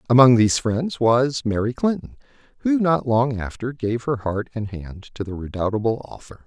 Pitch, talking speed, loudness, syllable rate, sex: 120 Hz, 175 wpm, -21 LUFS, 5.0 syllables/s, male